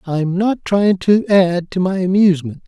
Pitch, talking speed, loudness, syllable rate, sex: 185 Hz, 180 wpm, -15 LUFS, 4.3 syllables/s, male